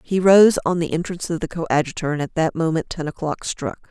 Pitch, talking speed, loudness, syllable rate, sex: 165 Hz, 230 wpm, -20 LUFS, 6.1 syllables/s, female